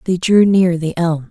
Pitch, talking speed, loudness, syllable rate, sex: 175 Hz, 230 wpm, -14 LUFS, 4.4 syllables/s, female